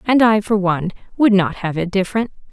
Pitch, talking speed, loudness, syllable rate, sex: 200 Hz, 215 wpm, -17 LUFS, 6.1 syllables/s, female